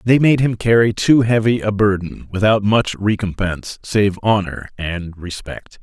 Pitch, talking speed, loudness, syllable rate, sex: 105 Hz, 155 wpm, -17 LUFS, 4.4 syllables/s, male